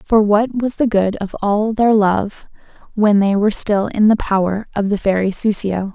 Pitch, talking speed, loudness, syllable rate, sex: 205 Hz, 200 wpm, -16 LUFS, 4.5 syllables/s, female